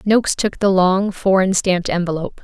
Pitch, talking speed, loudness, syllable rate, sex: 190 Hz, 170 wpm, -17 LUFS, 5.6 syllables/s, female